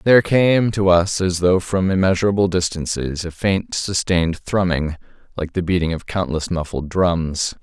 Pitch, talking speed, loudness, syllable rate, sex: 90 Hz, 150 wpm, -19 LUFS, 4.7 syllables/s, male